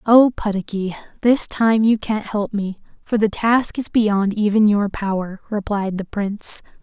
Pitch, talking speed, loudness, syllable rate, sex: 210 Hz, 165 wpm, -19 LUFS, 4.2 syllables/s, female